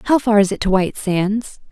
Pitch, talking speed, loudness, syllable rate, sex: 210 Hz, 245 wpm, -17 LUFS, 5.5 syllables/s, female